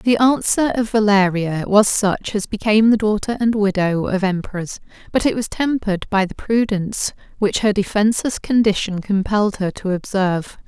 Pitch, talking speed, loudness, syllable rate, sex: 205 Hz, 165 wpm, -18 LUFS, 5.2 syllables/s, female